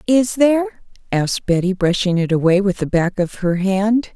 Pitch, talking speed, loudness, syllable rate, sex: 200 Hz, 190 wpm, -17 LUFS, 4.9 syllables/s, female